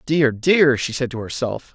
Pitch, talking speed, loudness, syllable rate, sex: 135 Hz, 205 wpm, -19 LUFS, 4.3 syllables/s, male